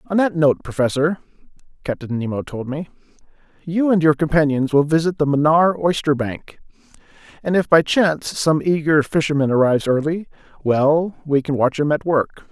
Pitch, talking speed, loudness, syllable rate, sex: 155 Hz, 160 wpm, -18 LUFS, 5.3 syllables/s, male